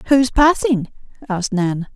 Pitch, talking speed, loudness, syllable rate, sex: 230 Hz, 155 wpm, -17 LUFS, 4.6 syllables/s, female